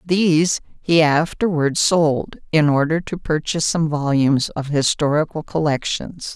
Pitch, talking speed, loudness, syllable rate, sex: 155 Hz, 125 wpm, -19 LUFS, 4.4 syllables/s, female